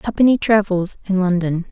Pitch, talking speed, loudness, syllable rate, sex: 190 Hz, 140 wpm, -17 LUFS, 5.2 syllables/s, female